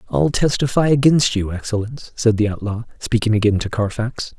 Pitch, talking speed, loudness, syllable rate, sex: 115 Hz, 165 wpm, -19 LUFS, 5.4 syllables/s, male